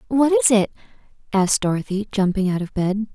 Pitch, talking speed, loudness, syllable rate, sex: 205 Hz, 170 wpm, -20 LUFS, 5.8 syllables/s, female